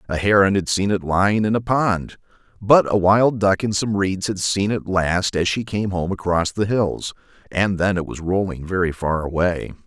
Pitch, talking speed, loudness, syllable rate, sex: 95 Hz, 215 wpm, -20 LUFS, 4.7 syllables/s, male